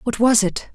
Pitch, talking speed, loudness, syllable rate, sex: 230 Hz, 240 wpm, -18 LUFS, 4.8 syllables/s, female